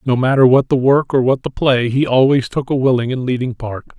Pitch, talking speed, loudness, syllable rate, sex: 130 Hz, 255 wpm, -15 LUFS, 5.6 syllables/s, male